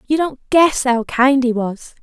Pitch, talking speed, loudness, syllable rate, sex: 260 Hz, 205 wpm, -16 LUFS, 4.1 syllables/s, female